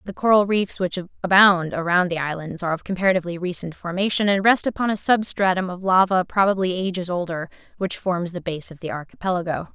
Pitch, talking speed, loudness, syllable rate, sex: 185 Hz, 185 wpm, -21 LUFS, 6.1 syllables/s, female